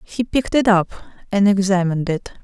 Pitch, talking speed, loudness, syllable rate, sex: 200 Hz, 175 wpm, -18 LUFS, 5.5 syllables/s, female